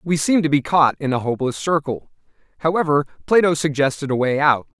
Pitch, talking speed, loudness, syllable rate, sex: 150 Hz, 190 wpm, -19 LUFS, 5.9 syllables/s, male